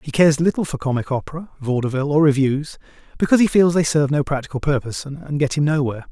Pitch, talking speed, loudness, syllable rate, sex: 145 Hz, 205 wpm, -19 LUFS, 7.4 syllables/s, male